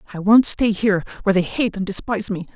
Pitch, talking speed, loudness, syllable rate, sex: 205 Hz, 235 wpm, -19 LUFS, 6.9 syllables/s, female